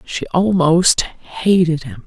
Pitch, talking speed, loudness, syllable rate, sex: 170 Hz, 115 wpm, -16 LUFS, 3.1 syllables/s, female